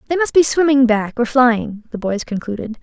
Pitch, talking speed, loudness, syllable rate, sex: 245 Hz, 210 wpm, -16 LUFS, 5.1 syllables/s, female